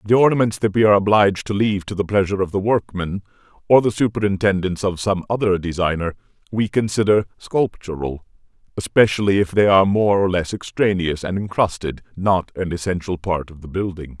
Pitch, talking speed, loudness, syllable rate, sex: 95 Hz, 170 wpm, -19 LUFS, 5.9 syllables/s, male